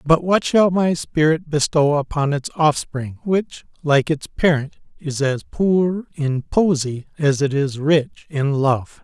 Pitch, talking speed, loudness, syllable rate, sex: 150 Hz, 160 wpm, -19 LUFS, 3.7 syllables/s, male